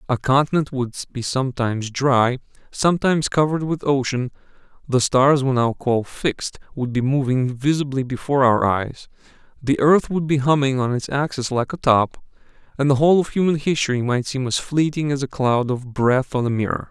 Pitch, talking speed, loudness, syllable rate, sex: 135 Hz, 185 wpm, -20 LUFS, 5.4 syllables/s, male